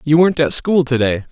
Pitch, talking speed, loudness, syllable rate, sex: 145 Hz, 275 wpm, -15 LUFS, 6.0 syllables/s, male